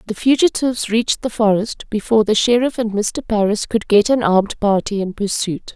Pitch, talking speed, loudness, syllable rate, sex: 220 Hz, 190 wpm, -17 LUFS, 5.4 syllables/s, female